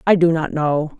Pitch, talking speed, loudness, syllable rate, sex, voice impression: 160 Hz, 240 wpm, -18 LUFS, 4.9 syllables/s, female, slightly feminine, adult-like, slightly fluent, slightly refreshing, unique